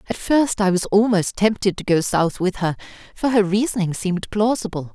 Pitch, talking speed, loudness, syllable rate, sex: 200 Hz, 195 wpm, -20 LUFS, 5.2 syllables/s, female